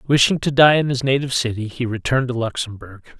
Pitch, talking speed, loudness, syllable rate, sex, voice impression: 125 Hz, 205 wpm, -18 LUFS, 6.3 syllables/s, male, masculine, middle-aged, slightly relaxed, slightly powerful, slightly soft, slightly muffled, raspy, cool, mature, friendly, unique, slightly wild, lively, slightly kind